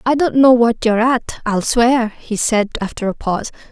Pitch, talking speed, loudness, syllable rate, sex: 230 Hz, 210 wpm, -16 LUFS, 5.0 syllables/s, female